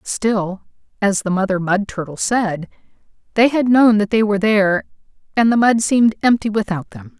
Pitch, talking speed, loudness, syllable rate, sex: 195 Hz, 175 wpm, -17 LUFS, 5.1 syllables/s, female